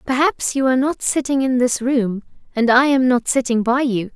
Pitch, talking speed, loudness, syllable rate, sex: 255 Hz, 215 wpm, -17 LUFS, 5.1 syllables/s, female